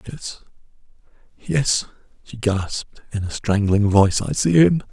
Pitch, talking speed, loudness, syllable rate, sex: 110 Hz, 120 wpm, -20 LUFS, 4.4 syllables/s, male